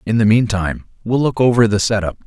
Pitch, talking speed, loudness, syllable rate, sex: 110 Hz, 210 wpm, -16 LUFS, 6.3 syllables/s, male